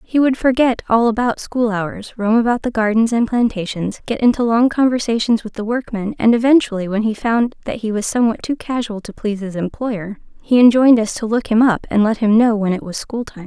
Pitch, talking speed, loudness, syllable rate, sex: 225 Hz, 225 wpm, -17 LUFS, 5.6 syllables/s, female